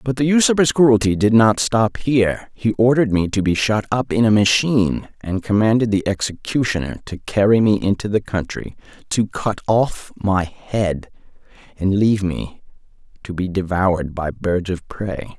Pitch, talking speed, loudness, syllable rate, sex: 105 Hz, 170 wpm, -18 LUFS, 4.7 syllables/s, male